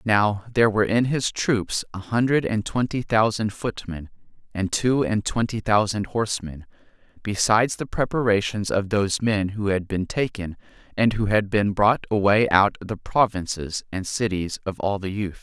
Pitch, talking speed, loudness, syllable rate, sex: 105 Hz, 170 wpm, -23 LUFS, 4.8 syllables/s, male